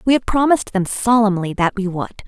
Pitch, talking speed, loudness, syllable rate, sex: 210 Hz, 210 wpm, -17 LUFS, 5.7 syllables/s, female